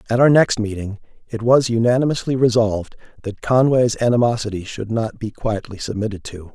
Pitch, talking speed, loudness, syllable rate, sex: 115 Hz, 155 wpm, -18 LUFS, 5.5 syllables/s, male